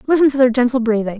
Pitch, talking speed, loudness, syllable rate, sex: 250 Hz, 250 wpm, -15 LUFS, 7.3 syllables/s, female